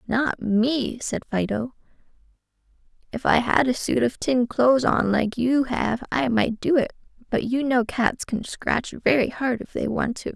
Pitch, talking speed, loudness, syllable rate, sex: 245 Hz, 185 wpm, -23 LUFS, 4.3 syllables/s, female